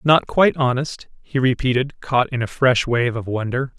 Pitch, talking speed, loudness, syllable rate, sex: 130 Hz, 190 wpm, -19 LUFS, 4.8 syllables/s, male